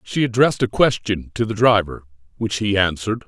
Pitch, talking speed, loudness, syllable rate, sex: 105 Hz, 185 wpm, -19 LUFS, 5.7 syllables/s, male